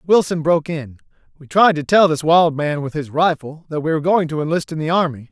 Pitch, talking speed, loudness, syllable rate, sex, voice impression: 160 Hz, 250 wpm, -17 LUFS, 5.8 syllables/s, male, very masculine, adult-like, slightly middle-aged, slightly thick, slightly tensed, slightly powerful, very bright, slightly soft, very clear, very fluent, cool, intellectual, very refreshing, very sincere, very calm, slightly mature, very friendly, reassuring, unique, slightly elegant, wild, slightly sweet, very lively, kind, slightly modest, light